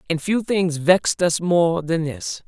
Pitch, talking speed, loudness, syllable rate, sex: 170 Hz, 195 wpm, -20 LUFS, 3.9 syllables/s, female